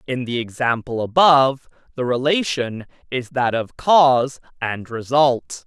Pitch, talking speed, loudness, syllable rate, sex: 130 Hz, 125 wpm, -19 LUFS, 4.2 syllables/s, male